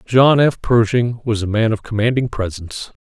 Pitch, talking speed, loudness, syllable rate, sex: 115 Hz, 180 wpm, -17 LUFS, 5.0 syllables/s, male